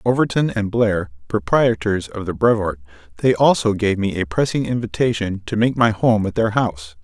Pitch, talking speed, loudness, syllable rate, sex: 105 Hz, 180 wpm, -19 LUFS, 5.1 syllables/s, male